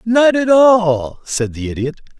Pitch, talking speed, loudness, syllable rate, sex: 185 Hz, 165 wpm, -14 LUFS, 3.8 syllables/s, male